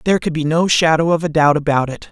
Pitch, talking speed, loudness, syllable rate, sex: 160 Hz, 285 wpm, -15 LUFS, 6.6 syllables/s, male